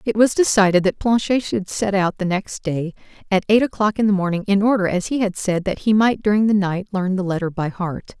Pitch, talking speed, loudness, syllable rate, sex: 200 Hz, 250 wpm, -19 LUFS, 5.5 syllables/s, female